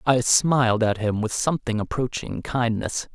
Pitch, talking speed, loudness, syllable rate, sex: 120 Hz, 155 wpm, -23 LUFS, 4.7 syllables/s, male